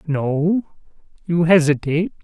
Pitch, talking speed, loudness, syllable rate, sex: 165 Hz, 80 wpm, -18 LUFS, 4.2 syllables/s, female